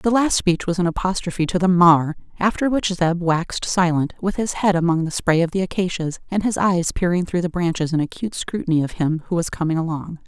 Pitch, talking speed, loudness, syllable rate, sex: 175 Hz, 220 wpm, -20 LUFS, 5.8 syllables/s, female